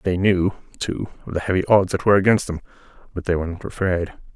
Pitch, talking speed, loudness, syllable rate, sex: 95 Hz, 220 wpm, -21 LUFS, 6.9 syllables/s, male